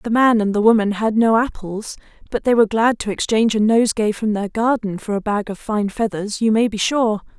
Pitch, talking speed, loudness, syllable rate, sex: 215 Hz, 235 wpm, -18 LUFS, 5.6 syllables/s, female